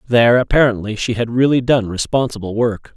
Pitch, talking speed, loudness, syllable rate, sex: 115 Hz, 160 wpm, -16 LUFS, 5.7 syllables/s, male